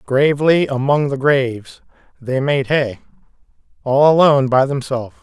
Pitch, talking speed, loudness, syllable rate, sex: 135 Hz, 125 wpm, -16 LUFS, 4.9 syllables/s, male